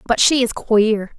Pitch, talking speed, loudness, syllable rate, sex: 225 Hz, 205 wpm, -16 LUFS, 4.0 syllables/s, female